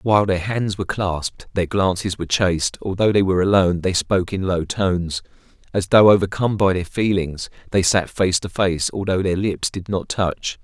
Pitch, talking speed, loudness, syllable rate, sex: 95 Hz, 195 wpm, -20 LUFS, 5.3 syllables/s, male